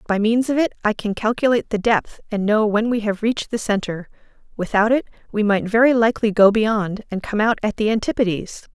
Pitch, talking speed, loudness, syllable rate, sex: 215 Hz, 215 wpm, -19 LUFS, 5.7 syllables/s, female